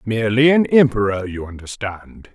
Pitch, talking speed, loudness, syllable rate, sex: 110 Hz, 130 wpm, -17 LUFS, 4.9 syllables/s, male